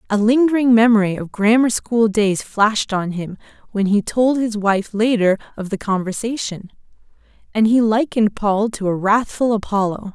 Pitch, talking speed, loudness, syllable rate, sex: 215 Hz, 160 wpm, -18 LUFS, 4.9 syllables/s, female